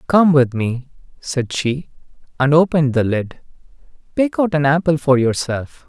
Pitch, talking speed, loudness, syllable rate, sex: 145 Hz, 155 wpm, -17 LUFS, 4.6 syllables/s, male